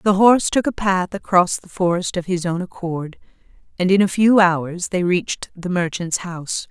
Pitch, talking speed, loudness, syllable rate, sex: 180 Hz, 195 wpm, -19 LUFS, 4.9 syllables/s, female